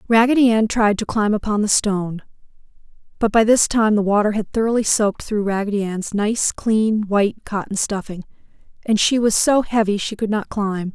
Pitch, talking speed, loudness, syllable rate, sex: 210 Hz, 185 wpm, -18 LUFS, 5.2 syllables/s, female